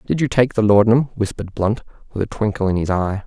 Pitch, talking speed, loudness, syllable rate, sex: 105 Hz, 240 wpm, -18 LUFS, 6.3 syllables/s, male